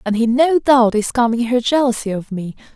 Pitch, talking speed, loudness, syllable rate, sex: 240 Hz, 220 wpm, -16 LUFS, 5.2 syllables/s, female